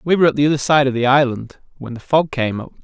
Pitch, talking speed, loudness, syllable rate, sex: 135 Hz, 295 wpm, -16 LUFS, 6.9 syllables/s, male